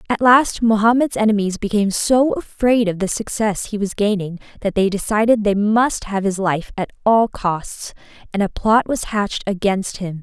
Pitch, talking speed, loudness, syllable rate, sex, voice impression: 210 Hz, 180 wpm, -18 LUFS, 4.8 syllables/s, female, very feminine, slightly young, bright, cute, slightly refreshing, friendly, slightly kind